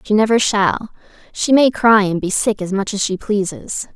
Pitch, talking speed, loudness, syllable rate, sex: 210 Hz, 195 wpm, -16 LUFS, 4.7 syllables/s, female